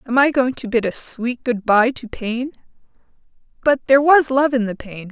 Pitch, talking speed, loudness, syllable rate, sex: 245 Hz, 210 wpm, -18 LUFS, 5.0 syllables/s, female